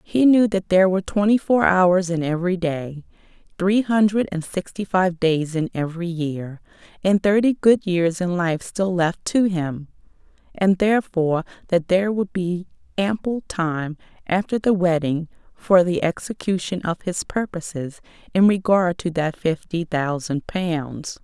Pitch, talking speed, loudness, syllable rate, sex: 180 Hz, 155 wpm, -21 LUFS, 4.4 syllables/s, female